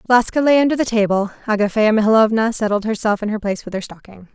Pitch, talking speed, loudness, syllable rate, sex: 215 Hz, 205 wpm, -17 LUFS, 6.8 syllables/s, female